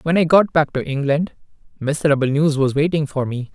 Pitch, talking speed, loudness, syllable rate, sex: 150 Hz, 205 wpm, -18 LUFS, 5.7 syllables/s, male